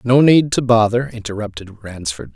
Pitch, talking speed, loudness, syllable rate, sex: 115 Hz, 155 wpm, -16 LUFS, 4.9 syllables/s, male